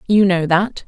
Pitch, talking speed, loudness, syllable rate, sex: 185 Hz, 205 wpm, -16 LUFS, 4.4 syllables/s, female